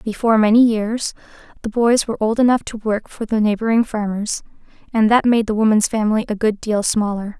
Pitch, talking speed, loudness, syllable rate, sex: 220 Hz, 195 wpm, -18 LUFS, 5.7 syllables/s, female